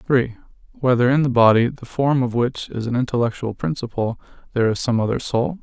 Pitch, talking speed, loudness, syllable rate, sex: 125 Hz, 190 wpm, -20 LUFS, 6.3 syllables/s, male